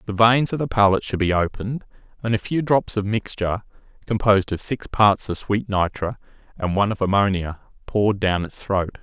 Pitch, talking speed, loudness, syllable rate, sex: 105 Hz, 195 wpm, -21 LUFS, 5.7 syllables/s, male